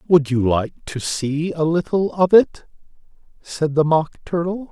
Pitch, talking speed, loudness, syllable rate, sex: 160 Hz, 165 wpm, -19 LUFS, 3.9 syllables/s, male